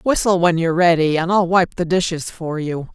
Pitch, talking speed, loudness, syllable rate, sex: 170 Hz, 225 wpm, -18 LUFS, 5.3 syllables/s, female